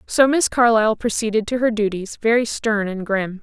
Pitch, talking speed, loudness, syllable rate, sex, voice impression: 220 Hz, 195 wpm, -19 LUFS, 5.2 syllables/s, female, feminine, adult-like, tensed, powerful, slightly bright, slightly hard, slightly raspy, intellectual, calm, slightly reassuring, elegant, lively, slightly strict, slightly sharp